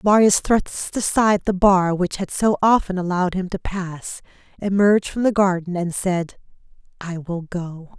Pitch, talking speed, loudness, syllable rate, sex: 185 Hz, 165 wpm, -20 LUFS, 4.8 syllables/s, female